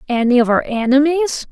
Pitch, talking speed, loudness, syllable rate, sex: 265 Hz, 160 wpm, -15 LUFS, 5.3 syllables/s, female